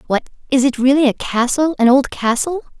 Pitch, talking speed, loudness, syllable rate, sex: 265 Hz, 195 wpm, -16 LUFS, 5.3 syllables/s, female